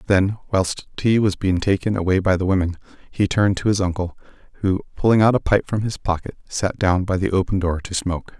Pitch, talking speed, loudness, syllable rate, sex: 95 Hz, 220 wpm, -20 LUFS, 5.7 syllables/s, male